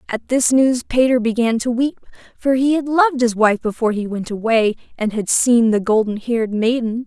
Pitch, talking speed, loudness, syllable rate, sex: 235 Hz, 205 wpm, -17 LUFS, 5.3 syllables/s, female